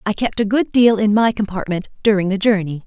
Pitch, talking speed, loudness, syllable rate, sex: 205 Hz, 230 wpm, -17 LUFS, 5.7 syllables/s, female